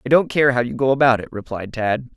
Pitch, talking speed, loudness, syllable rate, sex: 125 Hz, 280 wpm, -19 LUFS, 6.0 syllables/s, male